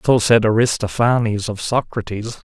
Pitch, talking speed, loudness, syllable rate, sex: 110 Hz, 120 wpm, -18 LUFS, 4.7 syllables/s, male